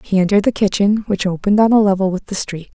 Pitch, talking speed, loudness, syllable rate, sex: 200 Hz, 260 wpm, -16 LUFS, 6.8 syllables/s, female